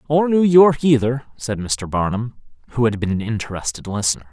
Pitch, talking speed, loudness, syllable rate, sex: 120 Hz, 180 wpm, -18 LUFS, 5.5 syllables/s, male